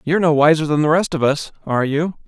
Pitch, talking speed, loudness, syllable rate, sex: 155 Hz, 265 wpm, -17 LUFS, 6.5 syllables/s, male